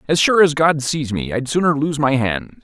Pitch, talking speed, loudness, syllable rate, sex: 140 Hz, 250 wpm, -17 LUFS, 4.9 syllables/s, male